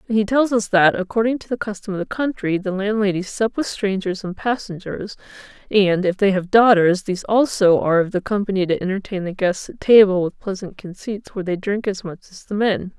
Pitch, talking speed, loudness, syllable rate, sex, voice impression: 200 Hz, 215 wpm, -19 LUFS, 5.5 syllables/s, female, feminine, adult-like, fluent, slightly cool, slightly intellectual, calm